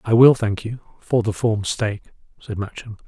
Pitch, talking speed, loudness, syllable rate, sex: 110 Hz, 195 wpm, -20 LUFS, 4.7 syllables/s, male